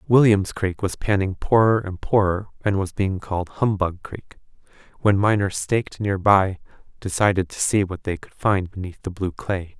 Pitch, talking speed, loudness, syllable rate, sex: 95 Hz, 180 wpm, -22 LUFS, 4.8 syllables/s, male